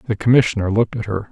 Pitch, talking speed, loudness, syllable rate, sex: 110 Hz, 230 wpm, -17 LUFS, 8.0 syllables/s, male